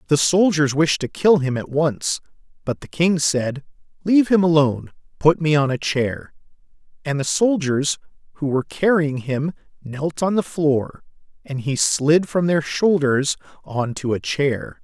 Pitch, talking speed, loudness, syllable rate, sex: 150 Hz, 165 wpm, -20 LUFS, 4.3 syllables/s, male